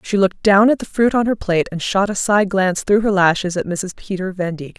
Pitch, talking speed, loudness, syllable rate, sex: 195 Hz, 275 wpm, -17 LUFS, 6.0 syllables/s, female